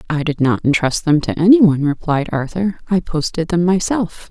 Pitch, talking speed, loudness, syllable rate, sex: 165 Hz, 195 wpm, -16 LUFS, 5.3 syllables/s, female